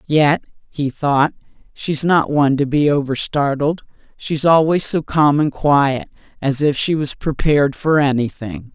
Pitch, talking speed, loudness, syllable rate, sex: 145 Hz, 150 wpm, -17 LUFS, 4.3 syllables/s, female